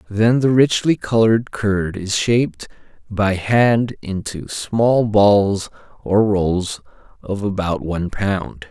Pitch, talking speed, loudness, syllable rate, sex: 100 Hz, 125 wpm, -18 LUFS, 3.4 syllables/s, male